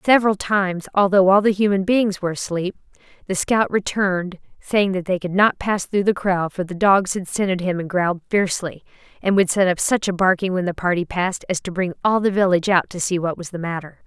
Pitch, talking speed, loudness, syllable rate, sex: 185 Hz, 230 wpm, -20 LUFS, 5.8 syllables/s, female